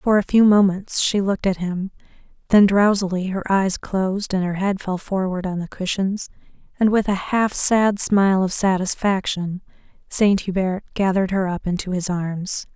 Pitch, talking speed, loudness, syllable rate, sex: 190 Hz, 175 wpm, -20 LUFS, 4.8 syllables/s, female